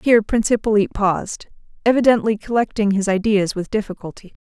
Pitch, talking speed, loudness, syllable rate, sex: 210 Hz, 135 wpm, -18 LUFS, 6.3 syllables/s, female